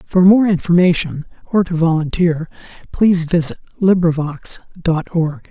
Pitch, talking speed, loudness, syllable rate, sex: 170 Hz, 120 wpm, -16 LUFS, 4.6 syllables/s, male